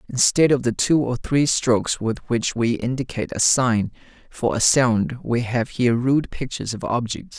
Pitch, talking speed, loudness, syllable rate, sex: 120 Hz, 185 wpm, -21 LUFS, 4.7 syllables/s, male